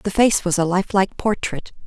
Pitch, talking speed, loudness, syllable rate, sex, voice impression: 190 Hz, 195 wpm, -19 LUFS, 5.9 syllables/s, female, feminine, adult-like, soft, sincere, calm, friendly, reassuring, kind